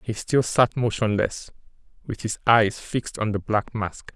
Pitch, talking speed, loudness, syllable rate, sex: 110 Hz, 175 wpm, -23 LUFS, 4.3 syllables/s, male